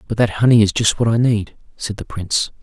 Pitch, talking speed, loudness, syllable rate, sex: 110 Hz, 250 wpm, -17 LUFS, 5.9 syllables/s, male